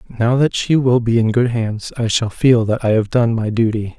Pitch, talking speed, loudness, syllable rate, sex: 115 Hz, 255 wpm, -16 LUFS, 5.0 syllables/s, male